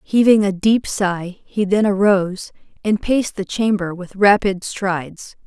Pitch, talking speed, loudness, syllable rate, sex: 200 Hz, 155 wpm, -18 LUFS, 4.2 syllables/s, female